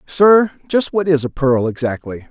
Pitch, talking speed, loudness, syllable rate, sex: 150 Hz, 180 wpm, -16 LUFS, 4.3 syllables/s, male